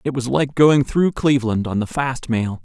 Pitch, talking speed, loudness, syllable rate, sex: 130 Hz, 225 wpm, -18 LUFS, 4.8 syllables/s, male